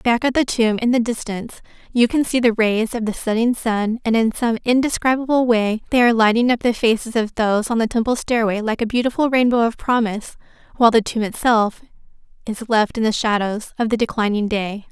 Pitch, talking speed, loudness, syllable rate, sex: 230 Hz, 210 wpm, -18 LUFS, 5.7 syllables/s, female